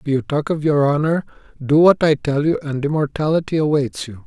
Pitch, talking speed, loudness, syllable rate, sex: 150 Hz, 210 wpm, -18 LUFS, 5.6 syllables/s, male